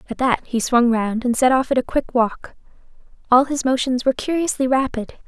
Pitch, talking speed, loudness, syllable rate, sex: 255 Hz, 205 wpm, -19 LUFS, 5.5 syllables/s, female